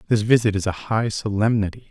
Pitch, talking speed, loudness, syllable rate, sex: 105 Hz, 190 wpm, -21 LUFS, 5.9 syllables/s, male